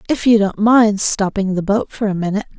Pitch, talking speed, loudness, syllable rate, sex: 205 Hz, 230 wpm, -16 LUFS, 5.7 syllables/s, female